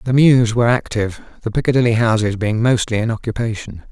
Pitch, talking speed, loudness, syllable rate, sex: 115 Hz, 170 wpm, -17 LUFS, 6.2 syllables/s, male